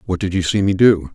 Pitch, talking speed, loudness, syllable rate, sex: 95 Hz, 315 wpm, -16 LUFS, 6.0 syllables/s, male